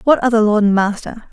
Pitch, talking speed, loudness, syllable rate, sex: 220 Hz, 225 wpm, -14 LUFS, 5.8 syllables/s, female